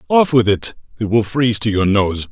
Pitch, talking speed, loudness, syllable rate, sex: 110 Hz, 235 wpm, -16 LUFS, 5.3 syllables/s, male